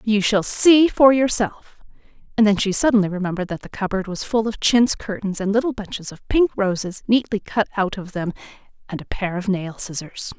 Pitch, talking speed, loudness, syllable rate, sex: 205 Hz, 195 wpm, -20 LUFS, 5.4 syllables/s, female